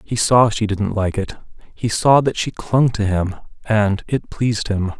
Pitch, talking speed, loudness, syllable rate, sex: 110 Hz, 205 wpm, -18 LUFS, 4.2 syllables/s, male